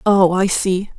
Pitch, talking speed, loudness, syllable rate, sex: 190 Hz, 180 wpm, -16 LUFS, 3.8 syllables/s, female